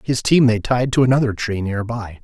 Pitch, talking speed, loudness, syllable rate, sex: 115 Hz, 240 wpm, -18 LUFS, 5.2 syllables/s, male